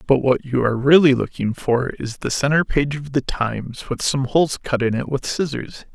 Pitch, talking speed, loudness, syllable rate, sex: 135 Hz, 220 wpm, -20 LUFS, 5.1 syllables/s, male